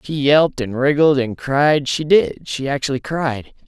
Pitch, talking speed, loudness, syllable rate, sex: 140 Hz, 145 wpm, -17 LUFS, 4.3 syllables/s, male